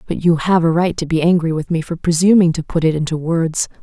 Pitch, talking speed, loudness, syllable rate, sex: 165 Hz, 265 wpm, -16 LUFS, 5.9 syllables/s, female